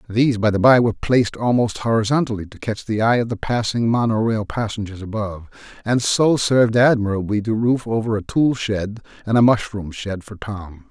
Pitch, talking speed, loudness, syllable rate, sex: 110 Hz, 195 wpm, -19 LUFS, 5.4 syllables/s, male